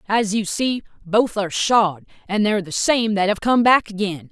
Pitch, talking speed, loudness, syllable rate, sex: 205 Hz, 210 wpm, -19 LUFS, 4.9 syllables/s, female